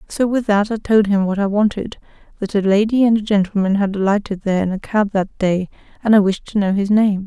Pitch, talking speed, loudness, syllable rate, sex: 205 Hz, 230 wpm, -17 LUFS, 5.6 syllables/s, female